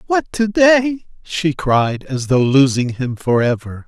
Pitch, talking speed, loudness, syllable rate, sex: 150 Hz, 170 wpm, -16 LUFS, 3.7 syllables/s, male